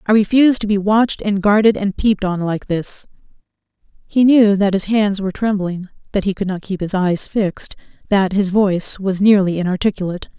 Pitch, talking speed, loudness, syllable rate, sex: 200 Hz, 190 wpm, -16 LUFS, 5.6 syllables/s, female